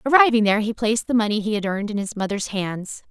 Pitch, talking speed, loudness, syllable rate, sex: 215 Hz, 250 wpm, -21 LUFS, 6.8 syllables/s, female